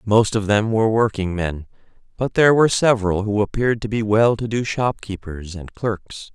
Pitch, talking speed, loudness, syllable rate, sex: 110 Hz, 190 wpm, -19 LUFS, 5.2 syllables/s, male